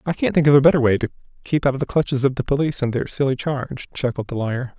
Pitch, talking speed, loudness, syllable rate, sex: 135 Hz, 290 wpm, -20 LUFS, 7.3 syllables/s, male